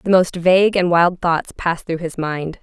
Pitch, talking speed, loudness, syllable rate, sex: 175 Hz, 230 wpm, -17 LUFS, 4.8 syllables/s, female